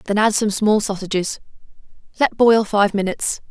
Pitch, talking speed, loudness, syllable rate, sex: 210 Hz, 155 wpm, -18 LUFS, 5.2 syllables/s, female